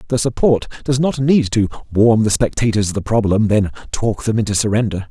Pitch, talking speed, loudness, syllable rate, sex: 110 Hz, 200 wpm, -17 LUFS, 5.6 syllables/s, male